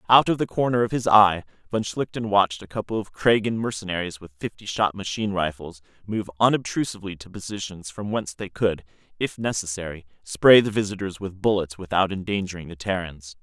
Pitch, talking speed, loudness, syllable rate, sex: 100 Hz, 175 wpm, -24 LUFS, 5.8 syllables/s, male